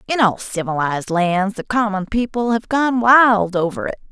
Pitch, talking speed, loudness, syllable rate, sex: 210 Hz, 175 wpm, -17 LUFS, 4.7 syllables/s, female